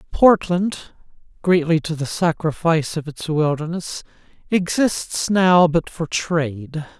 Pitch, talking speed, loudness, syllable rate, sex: 165 Hz, 110 wpm, -19 LUFS, 3.8 syllables/s, male